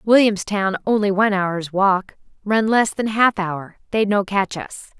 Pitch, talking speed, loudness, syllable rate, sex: 200 Hz, 170 wpm, -19 LUFS, 4.1 syllables/s, female